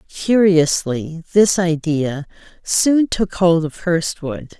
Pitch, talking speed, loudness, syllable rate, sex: 170 Hz, 105 wpm, -17 LUFS, 3.1 syllables/s, female